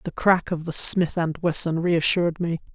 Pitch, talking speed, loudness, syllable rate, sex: 170 Hz, 195 wpm, -22 LUFS, 4.9 syllables/s, female